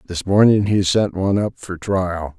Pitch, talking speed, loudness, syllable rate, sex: 95 Hz, 200 wpm, -18 LUFS, 4.5 syllables/s, male